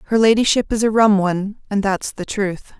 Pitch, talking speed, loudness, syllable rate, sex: 205 Hz, 215 wpm, -18 LUFS, 5.5 syllables/s, female